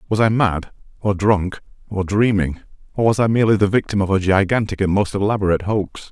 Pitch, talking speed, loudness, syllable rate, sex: 100 Hz, 195 wpm, -18 LUFS, 5.9 syllables/s, male